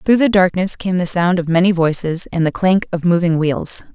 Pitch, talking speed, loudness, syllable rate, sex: 175 Hz, 230 wpm, -16 LUFS, 5.1 syllables/s, female